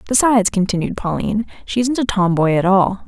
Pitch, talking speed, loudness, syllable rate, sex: 205 Hz, 175 wpm, -17 LUFS, 5.9 syllables/s, female